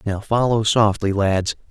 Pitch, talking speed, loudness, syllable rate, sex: 105 Hz, 140 wpm, -19 LUFS, 4.1 syllables/s, male